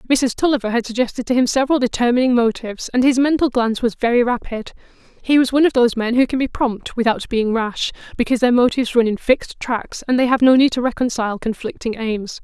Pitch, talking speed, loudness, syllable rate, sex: 245 Hz, 215 wpm, -18 LUFS, 6.4 syllables/s, female